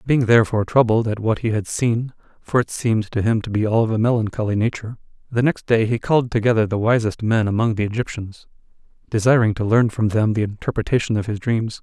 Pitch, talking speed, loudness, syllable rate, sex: 110 Hz, 215 wpm, -19 LUFS, 6.2 syllables/s, male